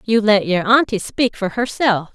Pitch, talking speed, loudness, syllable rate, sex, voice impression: 215 Hz, 195 wpm, -17 LUFS, 4.5 syllables/s, female, feminine, slightly adult-like, slightly cute, slightly calm, slightly elegant